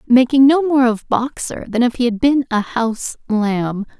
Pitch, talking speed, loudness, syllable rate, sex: 245 Hz, 195 wpm, -16 LUFS, 4.6 syllables/s, female